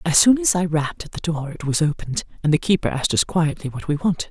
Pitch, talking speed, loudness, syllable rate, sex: 165 Hz, 280 wpm, -21 LUFS, 6.7 syllables/s, female